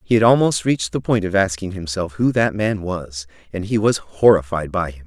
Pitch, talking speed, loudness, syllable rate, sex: 100 Hz, 225 wpm, -19 LUFS, 5.3 syllables/s, male